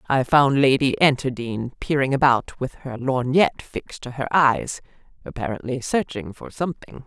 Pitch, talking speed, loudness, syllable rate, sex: 130 Hz, 145 wpm, -21 LUFS, 4.9 syllables/s, female